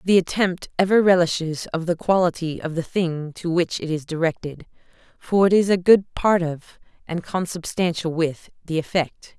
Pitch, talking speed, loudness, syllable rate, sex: 170 Hz, 175 wpm, -21 LUFS, 4.8 syllables/s, female